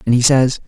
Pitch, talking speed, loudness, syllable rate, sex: 125 Hz, 265 wpm, -14 LUFS, 6.0 syllables/s, male